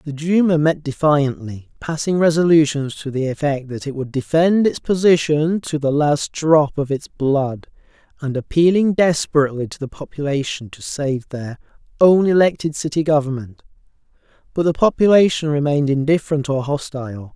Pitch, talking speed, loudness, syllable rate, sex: 150 Hz, 145 wpm, -18 LUFS, 5.1 syllables/s, male